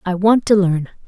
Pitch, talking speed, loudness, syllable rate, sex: 195 Hz, 225 wpm, -16 LUFS, 4.8 syllables/s, female